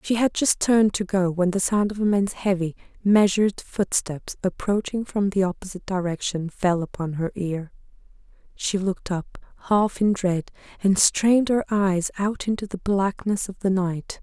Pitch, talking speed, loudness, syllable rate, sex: 195 Hz, 175 wpm, -23 LUFS, 4.7 syllables/s, female